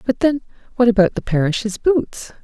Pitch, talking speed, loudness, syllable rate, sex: 230 Hz, 175 wpm, -18 LUFS, 4.7 syllables/s, female